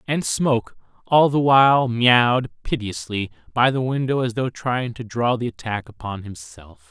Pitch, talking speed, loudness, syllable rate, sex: 115 Hz, 165 wpm, -20 LUFS, 4.6 syllables/s, male